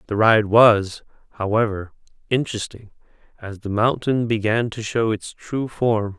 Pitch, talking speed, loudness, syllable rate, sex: 110 Hz, 135 wpm, -20 LUFS, 4.3 syllables/s, male